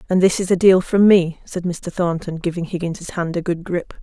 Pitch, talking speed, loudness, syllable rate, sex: 175 Hz, 240 wpm, -19 LUFS, 5.0 syllables/s, female